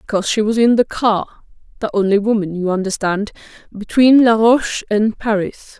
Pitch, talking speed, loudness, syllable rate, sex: 215 Hz, 135 wpm, -16 LUFS, 5.2 syllables/s, female